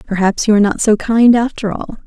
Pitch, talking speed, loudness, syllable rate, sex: 215 Hz, 230 wpm, -13 LUFS, 5.9 syllables/s, female